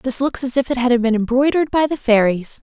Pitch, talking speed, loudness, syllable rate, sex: 250 Hz, 240 wpm, -17 LUFS, 5.8 syllables/s, female